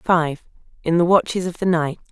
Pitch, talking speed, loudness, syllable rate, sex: 170 Hz, 200 wpm, -20 LUFS, 6.5 syllables/s, female